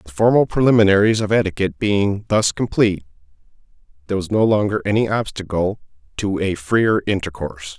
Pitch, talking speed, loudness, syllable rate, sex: 100 Hz, 140 wpm, -18 LUFS, 5.9 syllables/s, male